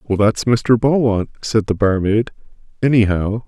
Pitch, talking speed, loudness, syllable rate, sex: 110 Hz, 140 wpm, -17 LUFS, 4.4 syllables/s, male